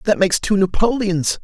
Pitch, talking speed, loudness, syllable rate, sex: 195 Hz, 165 wpm, -18 LUFS, 5.4 syllables/s, male